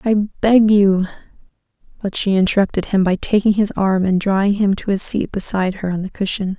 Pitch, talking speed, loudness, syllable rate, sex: 195 Hz, 200 wpm, -17 LUFS, 5.4 syllables/s, female